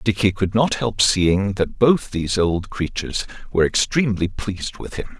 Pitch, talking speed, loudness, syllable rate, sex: 100 Hz, 175 wpm, -20 LUFS, 4.9 syllables/s, male